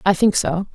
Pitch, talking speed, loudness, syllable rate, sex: 185 Hz, 240 wpm, -18 LUFS, 5.1 syllables/s, female